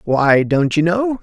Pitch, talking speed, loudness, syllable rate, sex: 170 Hz, 195 wpm, -15 LUFS, 3.6 syllables/s, male